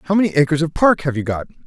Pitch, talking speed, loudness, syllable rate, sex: 155 Hz, 290 wpm, -17 LUFS, 7.0 syllables/s, male